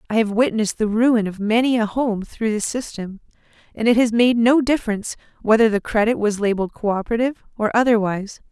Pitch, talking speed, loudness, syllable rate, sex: 220 Hz, 185 wpm, -19 LUFS, 6.2 syllables/s, female